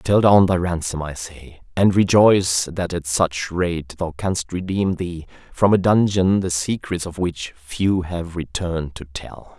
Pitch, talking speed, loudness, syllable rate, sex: 90 Hz, 175 wpm, -20 LUFS, 4.0 syllables/s, male